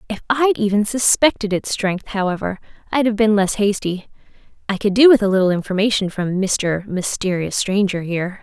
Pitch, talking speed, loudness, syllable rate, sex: 205 Hz, 170 wpm, -18 LUFS, 5.3 syllables/s, female